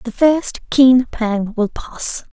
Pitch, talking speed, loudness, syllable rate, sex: 245 Hz, 155 wpm, -16 LUFS, 2.9 syllables/s, female